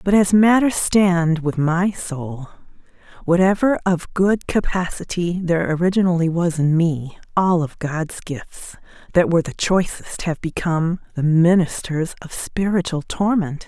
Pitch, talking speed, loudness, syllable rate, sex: 175 Hz, 135 wpm, -19 LUFS, 4.3 syllables/s, female